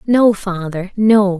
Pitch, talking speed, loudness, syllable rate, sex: 200 Hz, 130 wpm, -15 LUFS, 3.3 syllables/s, female